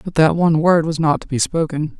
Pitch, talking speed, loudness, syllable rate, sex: 155 Hz, 270 wpm, -17 LUFS, 5.8 syllables/s, female